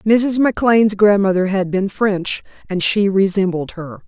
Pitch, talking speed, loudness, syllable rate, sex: 200 Hz, 145 wpm, -16 LUFS, 4.5 syllables/s, female